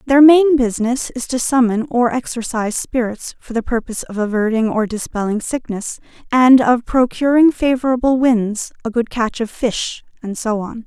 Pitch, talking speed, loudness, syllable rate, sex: 240 Hz, 165 wpm, -17 LUFS, 5.0 syllables/s, female